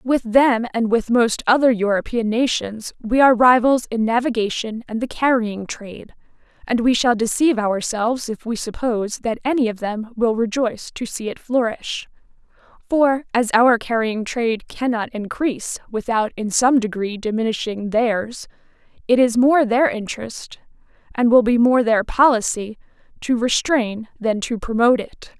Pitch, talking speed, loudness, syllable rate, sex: 230 Hz, 155 wpm, -19 LUFS, 4.7 syllables/s, female